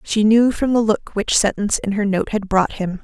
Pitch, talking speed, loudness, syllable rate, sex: 210 Hz, 255 wpm, -18 LUFS, 5.2 syllables/s, female